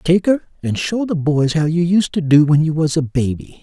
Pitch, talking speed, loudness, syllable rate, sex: 160 Hz, 265 wpm, -16 LUFS, 5.1 syllables/s, male